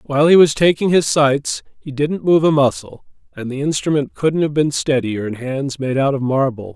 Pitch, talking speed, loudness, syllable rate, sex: 140 Hz, 215 wpm, -17 LUFS, 5.0 syllables/s, male